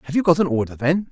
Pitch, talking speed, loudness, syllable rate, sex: 155 Hz, 325 wpm, -20 LUFS, 7.5 syllables/s, male